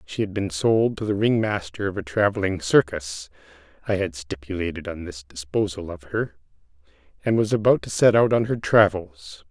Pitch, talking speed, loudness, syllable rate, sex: 105 Hz, 185 wpm, -23 LUFS, 3.8 syllables/s, male